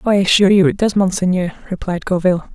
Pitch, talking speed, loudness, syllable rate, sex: 185 Hz, 190 wpm, -15 LUFS, 6.6 syllables/s, female